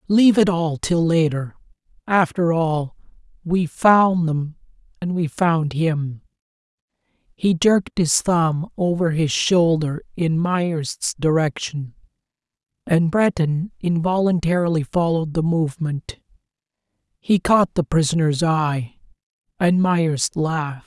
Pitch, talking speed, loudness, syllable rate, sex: 165 Hz, 105 wpm, -20 LUFS, 3.9 syllables/s, male